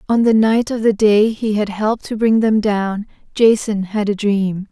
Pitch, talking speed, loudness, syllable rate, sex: 210 Hz, 215 wpm, -16 LUFS, 4.5 syllables/s, female